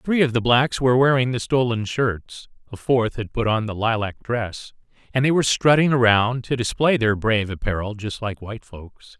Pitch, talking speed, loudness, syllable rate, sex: 115 Hz, 200 wpm, -20 LUFS, 5.0 syllables/s, male